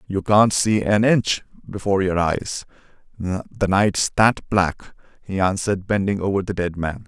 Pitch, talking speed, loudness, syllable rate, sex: 100 Hz, 155 wpm, -20 LUFS, 4.3 syllables/s, male